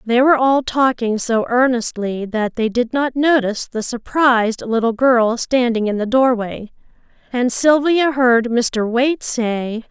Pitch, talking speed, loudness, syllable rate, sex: 240 Hz, 150 wpm, -17 LUFS, 4.2 syllables/s, female